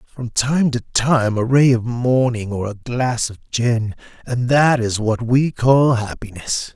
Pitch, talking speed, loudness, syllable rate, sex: 120 Hz, 180 wpm, -18 LUFS, 3.7 syllables/s, male